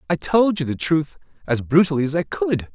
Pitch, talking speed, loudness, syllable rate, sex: 150 Hz, 220 wpm, -20 LUFS, 5.2 syllables/s, male